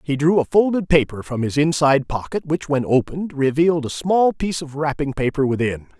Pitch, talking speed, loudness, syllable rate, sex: 145 Hz, 200 wpm, -19 LUFS, 5.7 syllables/s, male